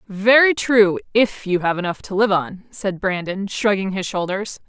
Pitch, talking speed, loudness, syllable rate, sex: 205 Hz, 180 wpm, -19 LUFS, 4.4 syllables/s, female